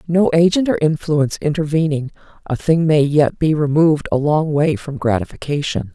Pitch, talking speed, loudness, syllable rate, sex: 150 Hz, 160 wpm, -17 LUFS, 5.2 syllables/s, female